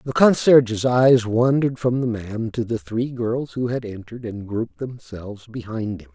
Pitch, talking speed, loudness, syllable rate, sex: 120 Hz, 185 wpm, -21 LUFS, 4.8 syllables/s, male